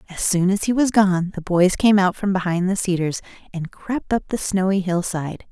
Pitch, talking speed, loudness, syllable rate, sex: 190 Hz, 220 wpm, -20 LUFS, 5.2 syllables/s, female